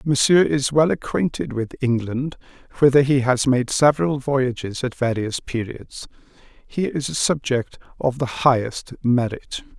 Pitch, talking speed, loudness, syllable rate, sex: 130 Hz, 140 wpm, -21 LUFS, 4.4 syllables/s, male